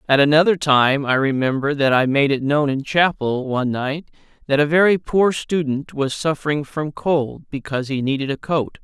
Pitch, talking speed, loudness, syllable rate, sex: 145 Hz, 190 wpm, -19 LUFS, 5.0 syllables/s, male